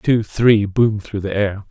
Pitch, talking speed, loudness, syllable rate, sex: 105 Hz, 210 wpm, -17 LUFS, 3.6 syllables/s, male